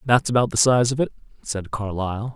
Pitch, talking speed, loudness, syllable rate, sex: 115 Hz, 205 wpm, -21 LUFS, 5.7 syllables/s, male